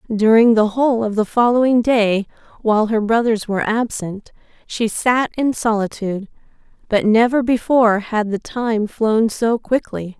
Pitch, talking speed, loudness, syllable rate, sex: 225 Hz, 145 wpm, -17 LUFS, 4.6 syllables/s, female